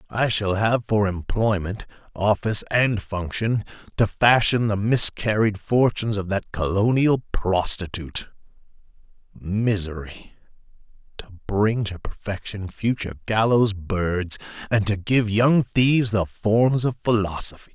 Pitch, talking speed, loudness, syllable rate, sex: 105 Hz, 115 wpm, -22 LUFS, 4.2 syllables/s, male